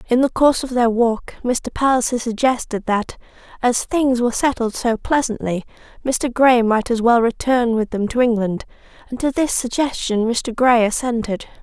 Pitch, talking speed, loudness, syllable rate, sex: 240 Hz, 170 wpm, -18 LUFS, 4.8 syllables/s, female